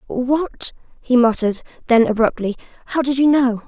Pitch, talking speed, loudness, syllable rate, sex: 250 Hz, 145 wpm, -18 LUFS, 5.1 syllables/s, female